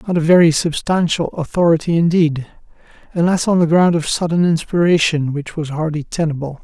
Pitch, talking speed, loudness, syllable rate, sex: 165 Hz, 155 wpm, -16 LUFS, 5.6 syllables/s, male